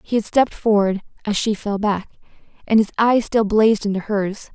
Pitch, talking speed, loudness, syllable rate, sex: 210 Hz, 200 wpm, -19 LUFS, 5.4 syllables/s, female